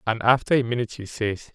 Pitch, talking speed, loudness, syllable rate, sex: 115 Hz, 235 wpm, -23 LUFS, 6.3 syllables/s, male